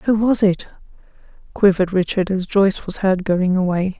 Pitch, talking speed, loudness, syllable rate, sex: 190 Hz, 165 wpm, -18 LUFS, 5.2 syllables/s, female